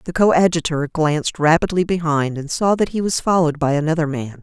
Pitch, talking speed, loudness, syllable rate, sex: 160 Hz, 190 wpm, -18 LUFS, 5.9 syllables/s, female